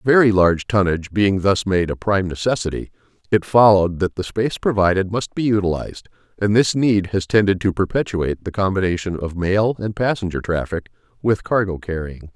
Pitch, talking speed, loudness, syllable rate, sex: 100 Hz, 170 wpm, -19 LUFS, 5.7 syllables/s, male